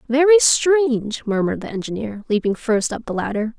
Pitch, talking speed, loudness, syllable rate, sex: 240 Hz, 165 wpm, -19 LUFS, 5.4 syllables/s, female